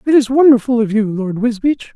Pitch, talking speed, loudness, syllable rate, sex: 235 Hz, 215 wpm, -14 LUFS, 5.6 syllables/s, male